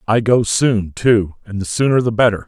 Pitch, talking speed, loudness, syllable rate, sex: 110 Hz, 220 wpm, -16 LUFS, 5.0 syllables/s, male